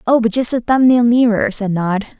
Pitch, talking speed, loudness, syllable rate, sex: 230 Hz, 245 wpm, -14 LUFS, 5.2 syllables/s, female